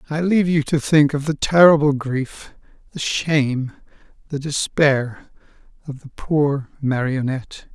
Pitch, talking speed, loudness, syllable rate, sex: 145 Hz, 130 wpm, -19 LUFS, 4.2 syllables/s, male